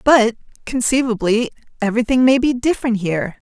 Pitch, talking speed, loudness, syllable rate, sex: 235 Hz, 120 wpm, -17 LUFS, 5.9 syllables/s, female